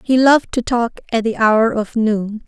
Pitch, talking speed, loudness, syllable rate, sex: 230 Hz, 220 wpm, -16 LUFS, 4.6 syllables/s, female